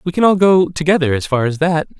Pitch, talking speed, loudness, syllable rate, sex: 165 Hz, 270 wpm, -15 LUFS, 6.1 syllables/s, male